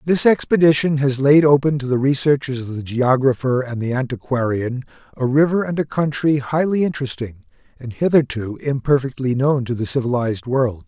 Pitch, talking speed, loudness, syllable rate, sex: 135 Hz, 160 wpm, -18 LUFS, 5.4 syllables/s, male